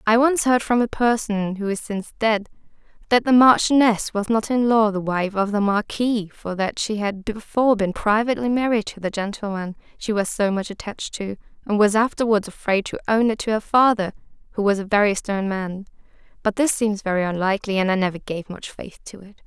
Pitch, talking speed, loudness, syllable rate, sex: 210 Hz, 210 wpm, -21 LUFS, 5.5 syllables/s, female